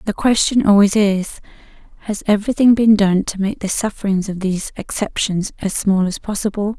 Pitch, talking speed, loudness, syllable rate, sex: 205 Hz, 170 wpm, -17 LUFS, 5.3 syllables/s, female